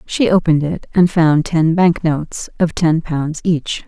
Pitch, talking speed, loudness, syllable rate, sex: 165 Hz, 185 wpm, -15 LUFS, 4.2 syllables/s, female